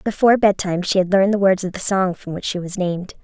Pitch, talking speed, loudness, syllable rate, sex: 190 Hz, 280 wpm, -18 LUFS, 6.7 syllables/s, female